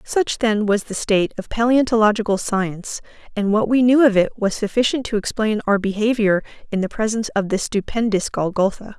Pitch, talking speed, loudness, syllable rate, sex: 215 Hz, 180 wpm, -19 LUFS, 5.5 syllables/s, female